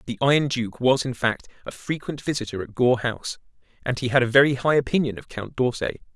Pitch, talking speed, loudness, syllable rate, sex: 125 Hz, 215 wpm, -23 LUFS, 6.0 syllables/s, male